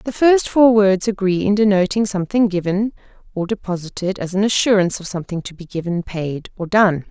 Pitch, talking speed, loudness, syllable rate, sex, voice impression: 195 Hz, 185 wpm, -18 LUFS, 5.6 syllables/s, female, very feminine, slightly young, slightly adult-like, very thin, tensed, slightly powerful, bright, soft, clear, fluent, slightly raspy, cute, intellectual, refreshing, slightly sincere, very calm, friendly, reassuring, slightly unique, very elegant, sweet, slightly lively, kind, slightly modest, slightly light